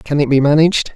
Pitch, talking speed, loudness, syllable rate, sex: 145 Hz, 250 wpm, -13 LUFS, 6.6 syllables/s, male